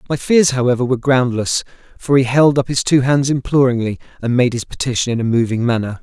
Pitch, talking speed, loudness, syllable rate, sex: 125 Hz, 210 wpm, -16 LUFS, 6.1 syllables/s, male